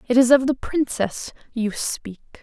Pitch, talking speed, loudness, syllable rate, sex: 245 Hz, 175 wpm, -21 LUFS, 4.2 syllables/s, female